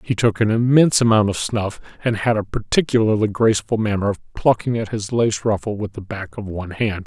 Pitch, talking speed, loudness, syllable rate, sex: 105 Hz, 210 wpm, -19 LUFS, 5.6 syllables/s, male